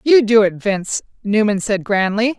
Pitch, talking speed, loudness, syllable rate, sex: 210 Hz, 175 wpm, -17 LUFS, 4.8 syllables/s, female